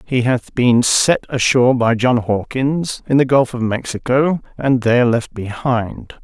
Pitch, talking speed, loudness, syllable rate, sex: 125 Hz, 165 wpm, -16 LUFS, 4.1 syllables/s, male